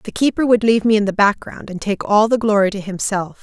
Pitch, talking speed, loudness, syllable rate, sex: 210 Hz, 265 wpm, -17 LUFS, 5.9 syllables/s, female